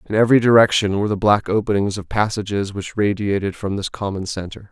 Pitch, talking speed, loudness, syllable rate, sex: 100 Hz, 190 wpm, -19 LUFS, 6.1 syllables/s, male